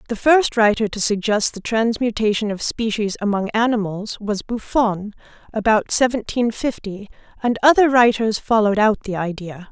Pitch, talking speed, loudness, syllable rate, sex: 220 Hz, 140 wpm, -19 LUFS, 4.9 syllables/s, female